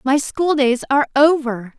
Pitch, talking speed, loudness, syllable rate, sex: 275 Hz, 170 wpm, -17 LUFS, 4.7 syllables/s, female